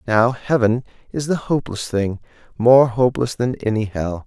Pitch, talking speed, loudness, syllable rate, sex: 120 Hz, 155 wpm, -19 LUFS, 4.9 syllables/s, male